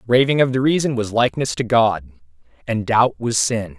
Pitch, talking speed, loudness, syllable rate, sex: 115 Hz, 190 wpm, -18 LUFS, 5.2 syllables/s, male